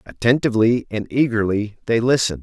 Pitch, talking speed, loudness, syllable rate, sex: 115 Hz, 125 wpm, -19 LUFS, 6.0 syllables/s, male